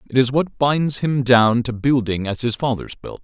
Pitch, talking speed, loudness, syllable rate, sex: 125 Hz, 225 wpm, -19 LUFS, 4.7 syllables/s, male